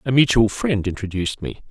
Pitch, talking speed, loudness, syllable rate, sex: 110 Hz, 175 wpm, -20 LUFS, 5.8 syllables/s, male